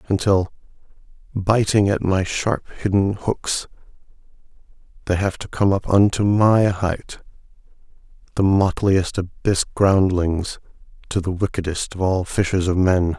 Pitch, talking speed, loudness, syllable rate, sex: 95 Hz, 125 wpm, -20 LUFS, 4.1 syllables/s, male